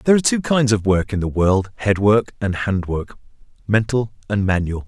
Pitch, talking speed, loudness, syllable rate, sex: 105 Hz, 195 wpm, -19 LUFS, 5.2 syllables/s, male